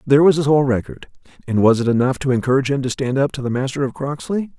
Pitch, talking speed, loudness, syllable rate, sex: 135 Hz, 260 wpm, -18 LUFS, 7.2 syllables/s, male